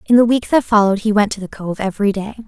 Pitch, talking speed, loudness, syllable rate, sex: 210 Hz, 290 wpm, -16 LUFS, 7.2 syllables/s, female